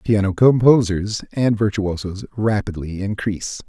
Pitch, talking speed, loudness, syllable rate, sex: 105 Hz, 100 wpm, -19 LUFS, 4.5 syllables/s, male